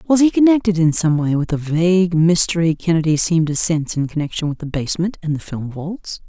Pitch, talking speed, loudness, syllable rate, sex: 170 Hz, 220 wpm, -17 LUFS, 5.8 syllables/s, female